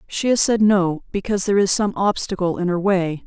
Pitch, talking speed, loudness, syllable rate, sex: 195 Hz, 220 wpm, -19 LUFS, 5.7 syllables/s, female